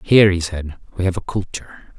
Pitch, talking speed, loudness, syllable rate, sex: 90 Hz, 210 wpm, -19 LUFS, 5.9 syllables/s, male